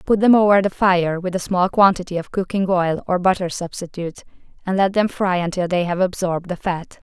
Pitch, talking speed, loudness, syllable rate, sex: 185 Hz, 210 wpm, -19 LUFS, 5.6 syllables/s, female